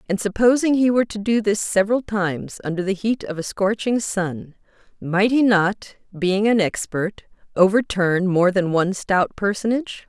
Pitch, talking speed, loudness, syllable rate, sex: 200 Hz, 165 wpm, -20 LUFS, 4.8 syllables/s, female